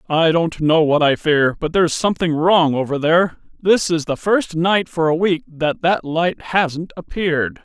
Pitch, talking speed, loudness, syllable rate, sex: 165 Hz, 195 wpm, -17 LUFS, 4.4 syllables/s, male